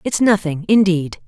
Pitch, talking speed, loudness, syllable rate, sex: 185 Hz, 140 wpm, -16 LUFS, 4.5 syllables/s, female